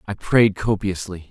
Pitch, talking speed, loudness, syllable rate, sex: 95 Hz, 140 wpm, -20 LUFS, 4.4 syllables/s, male